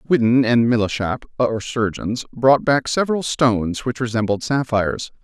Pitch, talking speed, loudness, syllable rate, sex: 120 Hz, 135 wpm, -19 LUFS, 5.1 syllables/s, male